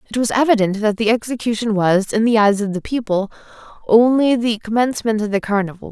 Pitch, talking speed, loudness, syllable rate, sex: 220 Hz, 195 wpm, -17 LUFS, 6.0 syllables/s, female